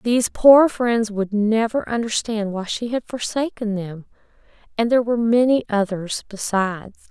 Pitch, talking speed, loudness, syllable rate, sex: 220 Hz, 145 wpm, -20 LUFS, 4.8 syllables/s, female